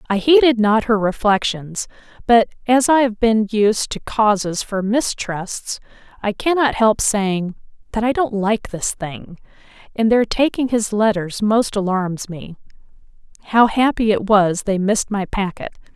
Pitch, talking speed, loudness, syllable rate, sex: 215 Hz, 150 wpm, -18 LUFS, 4.2 syllables/s, female